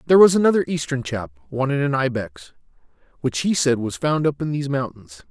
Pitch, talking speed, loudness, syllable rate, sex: 145 Hz, 190 wpm, -21 LUFS, 6.0 syllables/s, male